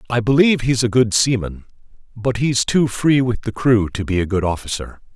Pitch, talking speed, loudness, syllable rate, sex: 120 Hz, 210 wpm, -18 LUFS, 5.3 syllables/s, male